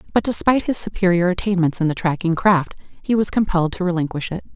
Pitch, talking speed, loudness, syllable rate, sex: 185 Hz, 200 wpm, -19 LUFS, 6.4 syllables/s, female